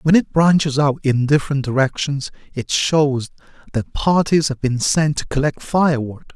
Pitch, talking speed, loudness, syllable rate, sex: 145 Hz, 160 wpm, -18 LUFS, 4.7 syllables/s, male